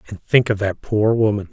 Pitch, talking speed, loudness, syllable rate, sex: 105 Hz, 235 wpm, -18 LUFS, 5.3 syllables/s, male